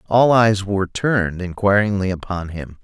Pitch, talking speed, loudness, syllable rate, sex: 100 Hz, 150 wpm, -18 LUFS, 4.9 syllables/s, male